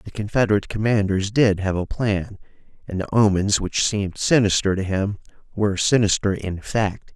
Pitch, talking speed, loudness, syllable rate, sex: 100 Hz, 160 wpm, -21 LUFS, 5.1 syllables/s, male